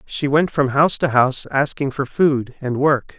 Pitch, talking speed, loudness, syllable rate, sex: 140 Hz, 205 wpm, -18 LUFS, 4.7 syllables/s, male